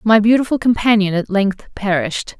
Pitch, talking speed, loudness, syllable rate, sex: 210 Hz, 150 wpm, -16 LUFS, 5.4 syllables/s, female